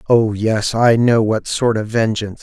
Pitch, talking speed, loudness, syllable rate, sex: 110 Hz, 200 wpm, -16 LUFS, 4.4 syllables/s, male